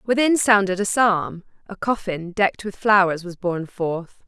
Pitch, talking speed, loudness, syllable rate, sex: 195 Hz, 170 wpm, -20 LUFS, 4.6 syllables/s, female